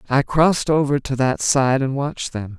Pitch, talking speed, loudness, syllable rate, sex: 135 Hz, 210 wpm, -19 LUFS, 5.0 syllables/s, male